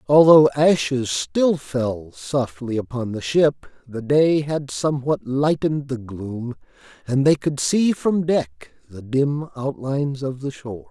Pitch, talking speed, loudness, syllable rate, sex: 140 Hz, 150 wpm, -20 LUFS, 3.8 syllables/s, male